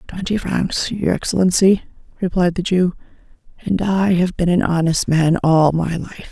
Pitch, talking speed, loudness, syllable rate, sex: 180 Hz, 160 wpm, -17 LUFS, 4.5 syllables/s, female